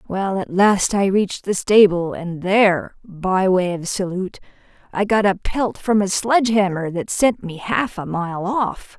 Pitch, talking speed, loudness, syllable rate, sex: 195 Hz, 185 wpm, -19 LUFS, 4.3 syllables/s, female